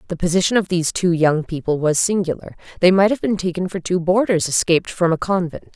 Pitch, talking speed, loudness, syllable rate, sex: 175 Hz, 220 wpm, -18 LUFS, 6.0 syllables/s, female